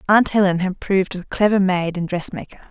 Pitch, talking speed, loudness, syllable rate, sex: 190 Hz, 200 wpm, -19 LUFS, 5.9 syllables/s, female